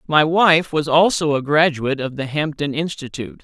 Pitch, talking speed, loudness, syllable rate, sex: 150 Hz, 175 wpm, -18 LUFS, 5.2 syllables/s, male